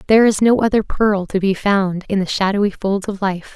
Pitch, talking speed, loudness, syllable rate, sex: 200 Hz, 235 wpm, -17 LUFS, 5.4 syllables/s, female